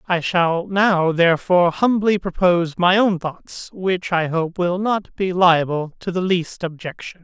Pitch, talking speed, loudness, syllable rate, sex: 180 Hz, 165 wpm, -19 LUFS, 4.1 syllables/s, male